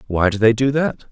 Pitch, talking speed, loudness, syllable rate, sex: 120 Hz, 270 wpm, -17 LUFS, 5.4 syllables/s, male